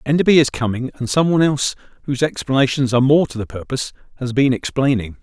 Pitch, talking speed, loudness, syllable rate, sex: 130 Hz, 195 wpm, -18 LUFS, 6.9 syllables/s, male